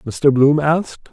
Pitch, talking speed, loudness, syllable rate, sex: 140 Hz, 160 wpm, -15 LUFS, 3.7 syllables/s, male